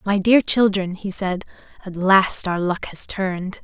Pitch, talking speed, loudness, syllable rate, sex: 190 Hz, 180 wpm, -20 LUFS, 4.2 syllables/s, female